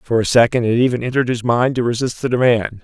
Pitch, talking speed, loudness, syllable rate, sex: 120 Hz, 255 wpm, -16 LUFS, 6.5 syllables/s, male